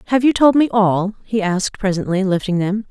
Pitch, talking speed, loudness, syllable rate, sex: 205 Hz, 205 wpm, -17 LUFS, 5.4 syllables/s, female